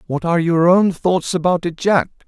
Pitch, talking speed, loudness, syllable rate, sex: 175 Hz, 210 wpm, -16 LUFS, 5.1 syllables/s, male